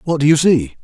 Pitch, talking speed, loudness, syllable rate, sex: 145 Hz, 285 wpm, -14 LUFS, 5.7 syllables/s, male